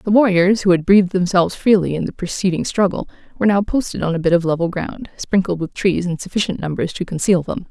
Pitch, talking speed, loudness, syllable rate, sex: 185 Hz, 225 wpm, -18 LUFS, 6.2 syllables/s, female